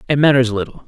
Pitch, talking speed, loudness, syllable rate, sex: 130 Hz, 205 wpm, -15 LUFS, 7.3 syllables/s, male